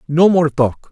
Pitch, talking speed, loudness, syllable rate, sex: 155 Hz, 195 wpm, -14 LUFS, 4.0 syllables/s, male